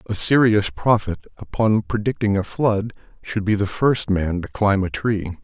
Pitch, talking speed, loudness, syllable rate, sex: 105 Hz, 175 wpm, -20 LUFS, 4.5 syllables/s, male